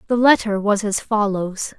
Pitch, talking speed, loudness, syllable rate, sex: 210 Hz, 170 wpm, -19 LUFS, 4.4 syllables/s, female